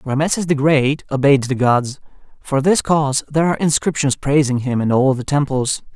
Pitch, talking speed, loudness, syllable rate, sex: 140 Hz, 180 wpm, -17 LUFS, 5.3 syllables/s, male